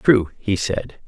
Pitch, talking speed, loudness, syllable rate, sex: 105 Hz, 165 wpm, -21 LUFS, 3.2 syllables/s, male